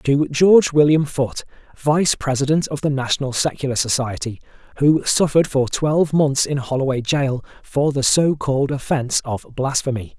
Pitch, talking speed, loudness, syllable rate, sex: 140 Hz, 145 wpm, -19 LUFS, 5.2 syllables/s, male